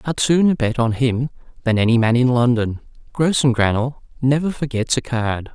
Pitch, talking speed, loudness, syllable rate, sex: 125 Hz, 160 wpm, -18 LUFS, 5.1 syllables/s, male